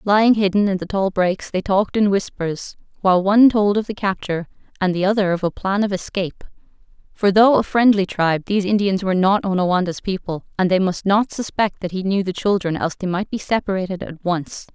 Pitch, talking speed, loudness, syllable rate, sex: 195 Hz, 210 wpm, -19 LUFS, 6.0 syllables/s, female